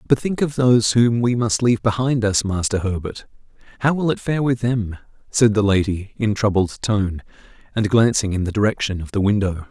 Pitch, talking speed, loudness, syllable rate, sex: 110 Hz, 200 wpm, -19 LUFS, 5.2 syllables/s, male